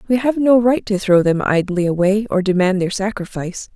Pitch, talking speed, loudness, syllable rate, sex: 205 Hz, 210 wpm, -17 LUFS, 5.4 syllables/s, female